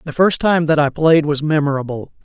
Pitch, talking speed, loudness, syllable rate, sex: 150 Hz, 215 wpm, -16 LUFS, 5.4 syllables/s, male